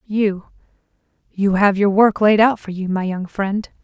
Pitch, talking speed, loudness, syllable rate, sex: 200 Hz, 170 wpm, -17 LUFS, 4.2 syllables/s, female